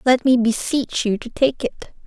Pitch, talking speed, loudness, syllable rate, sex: 245 Hz, 205 wpm, -20 LUFS, 4.3 syllables/s, female